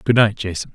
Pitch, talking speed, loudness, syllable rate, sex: 105 Hz, 245 wpm, -19 LUFS, 6.2 syllables/s, male